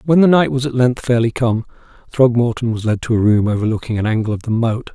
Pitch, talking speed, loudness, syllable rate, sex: 120 Hz, 245 wpm, -16 LUFS, 6.2 syllables/s, male